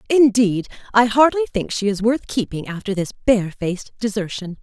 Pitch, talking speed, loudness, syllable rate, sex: 215 Hz, 155 wpm, -19 LUFS, 5.1 syllables/s, female